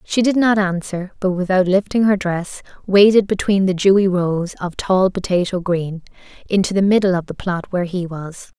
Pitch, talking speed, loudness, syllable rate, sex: 185 Hz, 190 wpm, -17 LUFS, 5.0 syllables/s, female